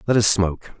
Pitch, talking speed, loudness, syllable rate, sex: 100 Hz, 225 wpm, -19 LUFS, 6.5 syllables/s, male